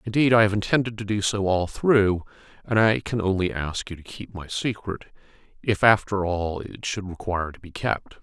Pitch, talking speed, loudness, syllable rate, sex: 100 Hz, 205 wpm, -24 LUFS, 5.1 syllables/s, male